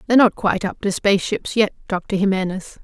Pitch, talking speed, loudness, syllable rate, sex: 195 Hz, 190 wpm, -19 LUFS, 6.0 syllables/s, female